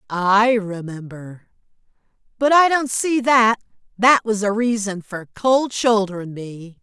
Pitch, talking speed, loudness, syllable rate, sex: 215 Hz, 130 wpm, -18 LUFS, 3.7 syllables/s, female